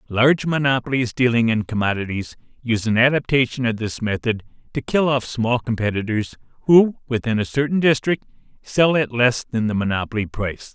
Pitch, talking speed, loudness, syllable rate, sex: 120 Hz, 155 wpm, -20 LUFS, 5.6 syllables/s, male